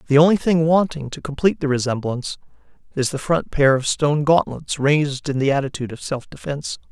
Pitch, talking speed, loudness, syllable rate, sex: 145 Hz, 190 wpm, -20 LUFS, 6.1 syllables/s, male